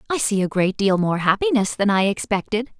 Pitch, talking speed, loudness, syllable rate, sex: 210 Hz, 215 wpm, -20 LUFS, 5.7 syllables/s, female